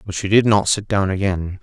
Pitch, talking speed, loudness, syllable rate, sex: 100 Hz, 260 wpm, -18 LUFS, 5.3 syllables/s, male